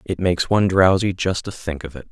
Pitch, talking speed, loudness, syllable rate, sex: 90 Hz, 255 wpm, -19 LUFS, 6.0 syllables/s, male